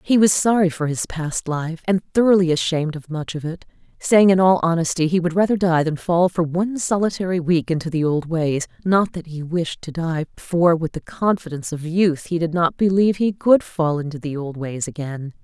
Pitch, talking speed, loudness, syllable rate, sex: 170 Hz, 215 wpm, -20 LUFS, 5.2 syllables/s, female